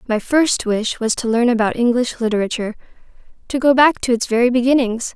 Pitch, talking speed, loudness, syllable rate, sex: 240 Hz, 185 wpm, -17 LUFS, 5.9 syllables/s, female